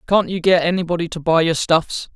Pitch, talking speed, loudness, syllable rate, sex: 170 Hz, 225 wpm, -18 LUFS, 5.6 syllables/s, male